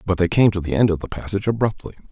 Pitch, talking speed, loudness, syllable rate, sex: 95 Hz, 285 wpm, -20 LUFS, 7.6 syllables/s, male